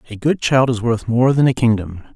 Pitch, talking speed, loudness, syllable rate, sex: 120 Hz, 250 wpm, -16 LUFS, 5.5 syllables/s, male